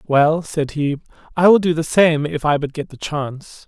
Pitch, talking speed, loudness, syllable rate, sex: 155 Hz, 230 wpm, -18 LUFS, 4.7 syllables/s, male